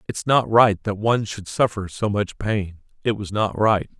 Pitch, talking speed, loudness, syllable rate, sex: 105 Hz, 210 wpm, -21 LUFS, 4.6 syllables/s, male